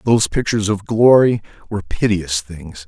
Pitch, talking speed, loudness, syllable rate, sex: 100 Hz, 145 wpm, -16 LUFS, 5.5 syllables/s, male